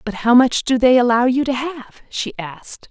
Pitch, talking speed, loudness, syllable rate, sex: 245 Hz, 230 wpm, -16 LUFS, 4.7 syllables/s, female